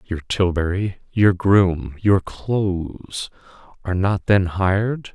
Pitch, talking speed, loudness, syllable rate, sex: 95 Hz, 115 wpm, -20 LUFS, 3.5 syllables/s, male